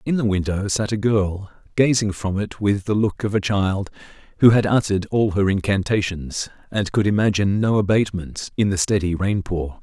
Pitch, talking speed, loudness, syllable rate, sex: 100 Hz, 190 wpm, -20 LUFS, 5.2 syllables/s, male